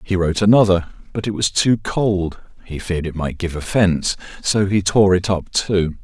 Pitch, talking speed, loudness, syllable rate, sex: 95 Hz, 200 wpm, -18 LUFS, 4.9 syllables/s, male